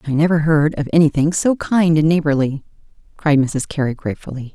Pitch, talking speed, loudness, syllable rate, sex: 155 Hz, 170 wpm, -17 LUFS, 5.7 syllables/s, female